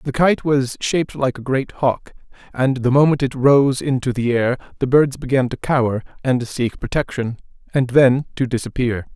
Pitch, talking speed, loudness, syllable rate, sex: 130 Hz, 175 wpm, -18 LUFS, 4.8 syllables/s, male